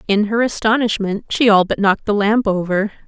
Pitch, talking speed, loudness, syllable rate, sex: 210 Hz, 195 wpm, -16 LUFS, 5.5 syllables/s, female